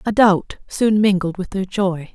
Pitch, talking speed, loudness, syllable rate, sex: 190 Hz, 195 wpm, -18 LUFS, 4.1 syllables/s, female